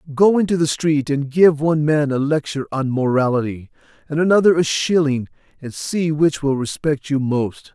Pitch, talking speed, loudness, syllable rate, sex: 145 Hz, 180 wpm, -18 LUFS, 5.1 syllables/s, male